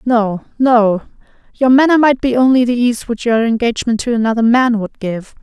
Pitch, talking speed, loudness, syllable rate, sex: 235 Hz, 190 wpm, -14 LUFS, 5.2 syllables/s, female